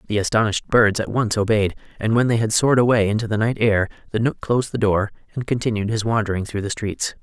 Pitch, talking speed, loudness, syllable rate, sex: 110 Hz, 235 wpm, -20 LUFS, 6.4 syllables/s, male